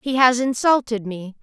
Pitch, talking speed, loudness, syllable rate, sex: 240 Hz, 170 wpm, -19 LUFS, 4.7 syllables/s, female